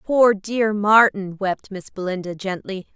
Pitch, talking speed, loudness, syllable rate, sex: 200 Hz, 140 wpm, -20 LUFS, 3.9 syllables/s, female